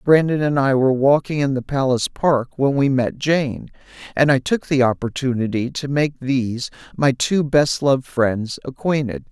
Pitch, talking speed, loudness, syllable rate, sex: 135 Hz, 175 wpm, -19 LUFS, 4.8 syllables/s, male